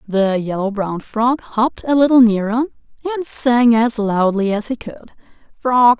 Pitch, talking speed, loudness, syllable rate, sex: 230 Hz, 160 wpm, -16 LUFS, 4.2 syllables/s, female